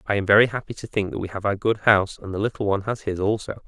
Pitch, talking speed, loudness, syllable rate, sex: 105 Hz, 310 wpm, -22 LUFS, 7.4 syllables/s, male